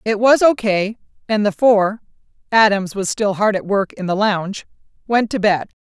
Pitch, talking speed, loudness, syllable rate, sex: 205 Hz, 175 wpm, -17 LUFS, 4.7 syllables/s, female